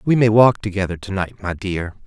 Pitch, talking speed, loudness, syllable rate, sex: 100 Hz, 205 wpm, -19 LUFS, 5.0 syllables/s, male